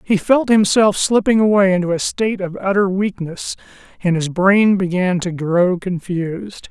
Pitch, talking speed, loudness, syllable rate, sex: 190 Hz, 160 wpm, -16 LUFS, 4.5 syllables/s, male